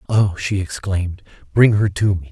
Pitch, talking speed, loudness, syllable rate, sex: 95 Hz, 180 wpm, -19 LUFS, 4.9 syllables/s, male